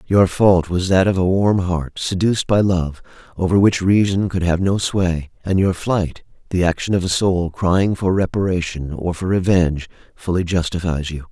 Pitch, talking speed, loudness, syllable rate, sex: 90 Hz, 185 wpm, -18 LUFS, 4.8 syllables/s, male